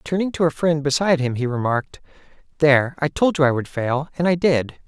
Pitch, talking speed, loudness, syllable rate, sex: 150 Hz, 220 wpm, -20 LUFS, 6.0 syllables/s, male